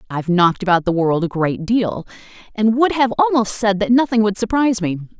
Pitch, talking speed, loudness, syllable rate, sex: 210 Hz, 220 wpm, -17 LUFS, 5.8 syllables/s, female